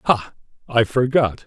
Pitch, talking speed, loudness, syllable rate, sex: 120 Hz, 125 wpm, -19 LUFS, 3.9 syllables/s, male